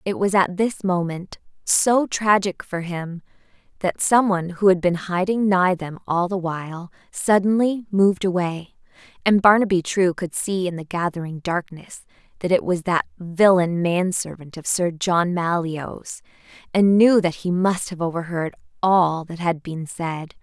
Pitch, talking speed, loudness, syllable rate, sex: 180 Hz, 160 wpm, -21 LUFS, 4.3 syllables/s, female